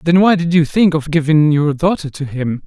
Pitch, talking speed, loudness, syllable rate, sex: 155 Hz, 250 wpm, -14 LUFS, 5.1 syllables/s, male